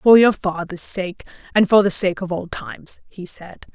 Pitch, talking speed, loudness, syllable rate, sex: 190 Hz, 210 wpm, -19 LUFS, 4.6 syllables/s, female